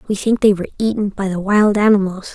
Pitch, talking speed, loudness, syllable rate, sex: 200 Hz, 230 wpm, -16 LUFS, 6.3 syllables/s, female